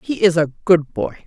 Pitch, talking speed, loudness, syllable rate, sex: 170 Hz, 240 wpm, -17 LUFS, 5.1 syllables/s, female